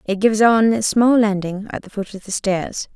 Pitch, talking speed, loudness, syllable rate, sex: 210 Hz, 245 wpm, -18 LUFS, 5.1 syllables/s, female